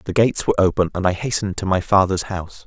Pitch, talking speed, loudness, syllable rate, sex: 95 Hz, 245 wpm, -19 LUFS, 7.0 syllables/s, male